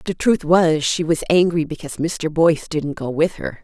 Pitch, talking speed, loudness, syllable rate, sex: 160 Hz, 215 wpm, -19 LUFS, 5.0 syllables/s, female